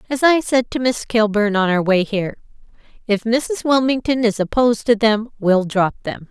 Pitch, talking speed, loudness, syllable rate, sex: 225 Hz, 190 wpm, -18 LUFS, 4.9 syllables/s, female